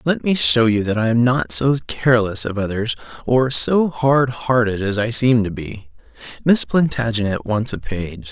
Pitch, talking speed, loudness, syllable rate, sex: 115 Hz, 190 wpm, -18 LUFS, 4.5 syllables/s, male